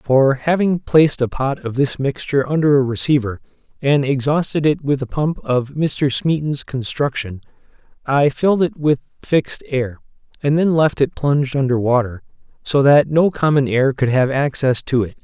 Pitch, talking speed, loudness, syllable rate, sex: 140 Hz, 175 wpm, -17 LUFS, 4.9 syllables/s, male